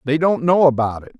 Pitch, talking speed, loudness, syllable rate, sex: 145 Hz, 250 wpm, -17 LUFS, 6.2 syllables/s, male